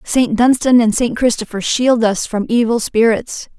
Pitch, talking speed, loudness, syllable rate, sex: 230 Hz, 165 wpm, -15 LUFS, 4.4 syllables/s, female